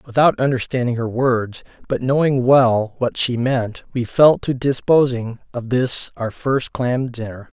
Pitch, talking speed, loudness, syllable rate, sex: 125 Hz, 160 wpm, -18 LUFS, 4.1 syllables/s, male